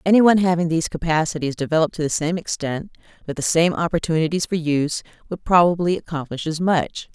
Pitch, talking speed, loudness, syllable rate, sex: 165 Hz, 175 wpm, -20 LUFS, 6.4 syllables/s, female